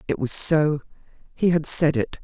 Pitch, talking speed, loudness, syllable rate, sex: 150 Hz, 190 wpm, -20 LUFS, 4.6 syllables/s, female